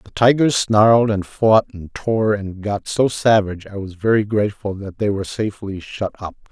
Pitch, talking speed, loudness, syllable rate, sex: 105 Hz, 195 wpm, -18 LUFS, 5.0 syllables/s, male